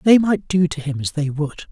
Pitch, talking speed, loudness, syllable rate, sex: 160 Hz, 280 wpm, -20 LUFS, 5.6 syllables/s, male